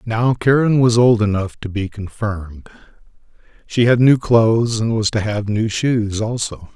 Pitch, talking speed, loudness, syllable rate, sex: 110 Hz, 170 wpm, -17 LUFS, 4.4 syllables/s, male